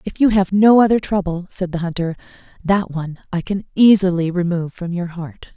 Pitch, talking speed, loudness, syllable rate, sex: 180 Hz, 195 wpm, -18 LUFS, 5.5 syllables/s, female